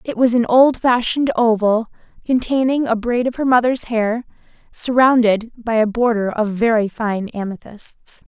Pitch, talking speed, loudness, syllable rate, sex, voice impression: 230 Hz, 145 wpm, -17 LUFS, 4.5 syllables/s, female, feminine, slightly adult-like, clear, slightly fluent, cute, slightly refreshing, friendly